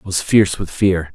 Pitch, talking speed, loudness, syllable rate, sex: 90 Hz, 260 wpm, -16 LUFS, 5.7 syllables/s, male